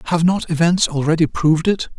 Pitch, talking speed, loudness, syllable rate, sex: 165 Hz, 180 wpm, -17 LUFS, 5.9 syllables/s, male